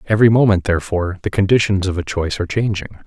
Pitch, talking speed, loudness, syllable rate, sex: 95 Hz, 195 wpm, -17 LUFS, 7.4 syllables/s, male